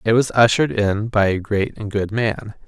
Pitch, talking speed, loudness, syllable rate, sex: 110 Hz, 225 wpm, -19 LUFS, 4.8 syllables/s, male